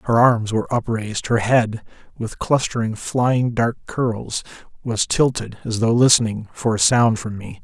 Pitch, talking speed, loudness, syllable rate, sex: 115 Hz, 165 wpm, -19 LUFS, 4.4 syllables/s, male